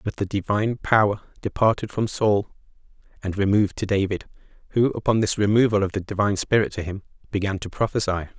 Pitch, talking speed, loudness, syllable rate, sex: 100 Hz, 170 wpm, -23 LUFS, 6.4 syllables/s, male